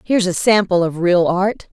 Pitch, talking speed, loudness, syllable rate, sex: 185 Hz, 200 wpm, -16 LUFS, 5.0 syllables/s, female